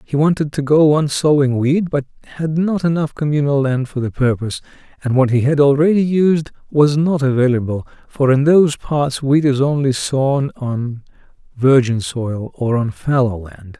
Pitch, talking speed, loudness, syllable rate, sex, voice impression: 140 Hz, 175 wpm, -16 LUFS, 4.7 syllables/s, male, masculine, middle-aged, relaxed, slightly weak, soft, slightly raspy, sincere, calm, mature, friendly, reassuring, wild, kind, slightly modest